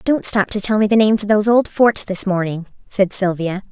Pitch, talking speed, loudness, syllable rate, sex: 200 Hz, 240 wpm, -17 LUFS, 5.7 syllables/s, female